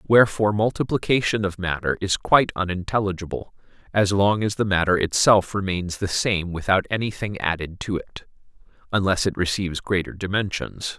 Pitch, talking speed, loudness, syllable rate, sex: 100 Hz, 140 wpm, -22 LUFS, 5.4 syllables/s, male